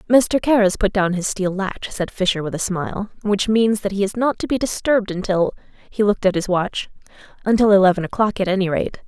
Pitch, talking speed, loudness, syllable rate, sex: 200 Hz, 220 wpm, -19 LUFS, 5.8 syllables/s, female